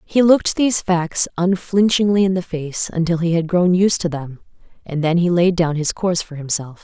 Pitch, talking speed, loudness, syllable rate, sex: 175 Hz, 210 wpm, -18 LUFS, 5.2 syllables/s, female